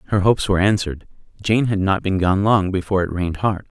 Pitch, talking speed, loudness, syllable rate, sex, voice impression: 95 Hz, 220 wpm, -19 LUFS, 6.8 syllables/s, male, very masculine, very middle-aged, very thick, tensed, slightly weak, slightly bright, soft, muffled, fluent, slightly raspy, cool, very intellectual, very refreshing, sincere, very calm, mature, very friendly, very reassuring, very unique, very elegant, wild, slightly sweet, lively, kind